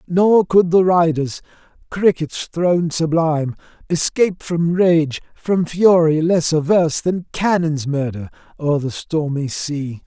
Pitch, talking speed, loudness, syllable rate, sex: 165 Hz, 125 wpm, -17 LUFS, 4.1 syllables/s, male